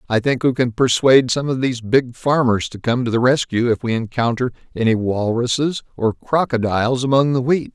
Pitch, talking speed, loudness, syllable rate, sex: 125 Hz, 195 wpm, -18 LUFS, 5.4 syllables/s, male